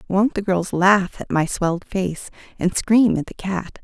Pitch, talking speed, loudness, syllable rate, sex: 190 Hz, 205 wpm, -20 LUFS, 4.3 syllables/s, female